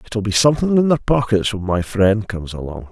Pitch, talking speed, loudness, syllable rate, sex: 110 Hz, 225 wpm, -18 LUFS, 5.7 syllables/s, male